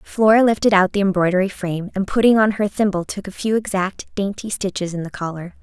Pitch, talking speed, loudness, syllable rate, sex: 195 Hz, 215 wpm, -19 LUFS, 6.0 syllables/s, female